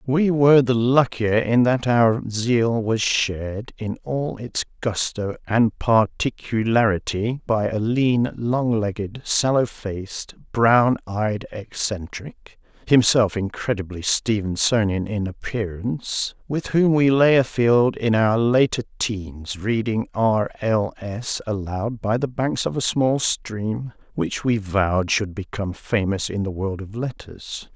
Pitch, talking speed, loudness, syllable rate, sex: 115 Hz, 135 wpm, -21 LUFS, 3.3 syllables/s, male